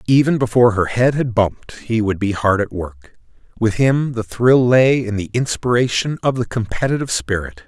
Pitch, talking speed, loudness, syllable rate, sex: 115 Hz, 190 wpm, -17 LUFS, 5.2 syllables/s, male